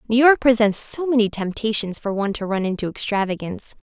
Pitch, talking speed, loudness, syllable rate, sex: 220 Hz, 185 wpm, -20 LUFS, 6.1 syllables/s, female